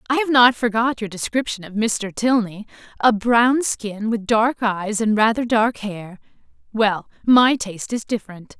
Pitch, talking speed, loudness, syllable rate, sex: 220 Hz, 170 wpm, -19 LUFS, 4.3 syllables/s, female